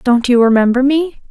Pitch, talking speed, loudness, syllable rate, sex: 255 Hz, 185 wpm, -12 LUFS, 5.2 syllables/s, female